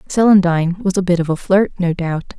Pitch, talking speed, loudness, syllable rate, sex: 180 Hz, 225 wpm, -16 LUFS, 5.9 syllables/s, female